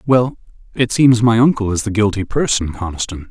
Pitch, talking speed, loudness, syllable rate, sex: 110 Hz, 180 wpm, -16 LUFS, 5.3 syllables/s, male